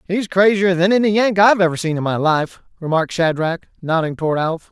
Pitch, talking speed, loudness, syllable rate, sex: 175 Hz, 205 wpm, -17 LUFS, 5.8 syllables/s, male